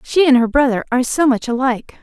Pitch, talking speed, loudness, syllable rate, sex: 255 Hz, 235 wpm, -15 LUFS, 6.6 syllables/s, female